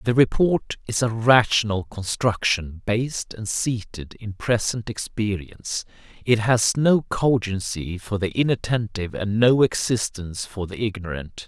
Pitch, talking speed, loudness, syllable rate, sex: 110 Hz, 130 wpm, -22 LUFS, 4.3 syllables/s, male